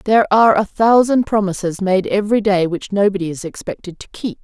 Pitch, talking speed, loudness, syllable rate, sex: 200 Hz, 190 wpm, -16 LUFS, 6.0 syllables/s, female